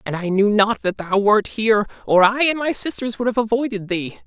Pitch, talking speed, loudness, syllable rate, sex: 215 Hz, 240 wpm, -19 LUFS, 5.4 syllables/s, male